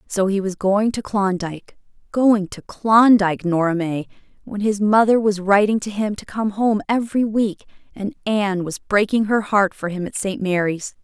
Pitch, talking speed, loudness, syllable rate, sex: 205 Hz, 180 wpm, -19 LUFS, 4.8 syllables/s, female